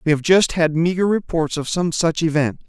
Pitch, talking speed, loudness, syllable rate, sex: 165 Hz, 225 wpm, -18 LUFS, 5.2 syllables/s, male